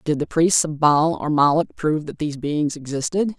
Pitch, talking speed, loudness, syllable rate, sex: 155 Hz, 215 wpm, -20 LUFS, 5.2 syllables/s, female